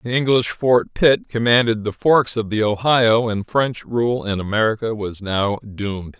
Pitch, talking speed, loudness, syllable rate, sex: 115 Hz, 175 wpm, -19 LUFS, 4.3 syllables/s, male